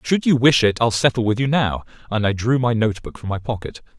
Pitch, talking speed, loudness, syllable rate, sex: 115 Hz, 270 wpm, -19 LUFS, 5.8 syllables/s, male